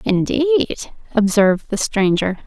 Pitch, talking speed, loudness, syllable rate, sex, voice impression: 220 Hz, 95 wpm, -17 LUFS, 4.2 syllables/s, female, feminine, adult-like, tensed, slightly powerful, bright, soft, clear, slightly cute, calm, friendly, reassuring, elegant, slightly sweet, kind, slightly modest